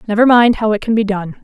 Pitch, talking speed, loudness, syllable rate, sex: 215 Hz, 295 wpm, -13 LUFS, 6.3 syllables/s, female